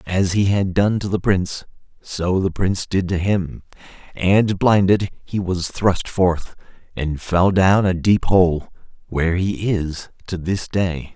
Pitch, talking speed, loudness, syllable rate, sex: 95 Hz, 165 wpm, -19 LUFS, 3.8 syllables/s, male